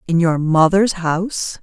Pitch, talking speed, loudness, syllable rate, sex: 175 Hz, 150 wpm, -16 LUFS, 4.1 syllables/s, female